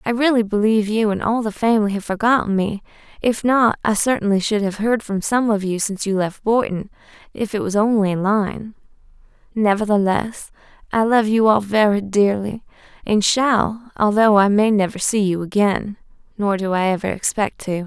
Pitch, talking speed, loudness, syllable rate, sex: 210 Hz, 180 wpm, -18 LUFS, 5.1 syllables/s, female